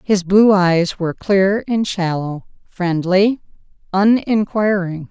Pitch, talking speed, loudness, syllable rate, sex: 190 Hz, 105 wpm, -16 LUFS, 3.5 syllables/s, female